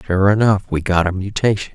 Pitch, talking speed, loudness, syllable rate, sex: 100 Hz, 205 wpm, -17 LUFS, 5.7 syllables/s, female